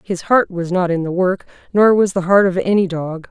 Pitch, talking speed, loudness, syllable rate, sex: 185 Hz, 255 wpm, -16 LUFS, 5.1 syllables/s, female